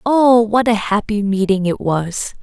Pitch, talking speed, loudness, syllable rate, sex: 215 Hz, 175 wpm, -16 LUFS, 4.0 syllables/s, female